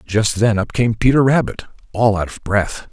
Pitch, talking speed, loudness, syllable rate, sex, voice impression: 110 Hz, 205 wpm, -17 LUFS, 4.7 syllables/s, male, masculine, middle-aged, thick, tensed, slightly powerful, hard, fluent, cool, calm, mature, wild, lively, slightly strict, modest